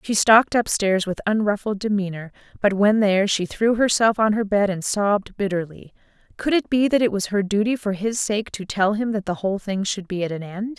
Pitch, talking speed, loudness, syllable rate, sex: 205 Hz, 230 wpm, -21 LUFS, 5.5 syllables/s, female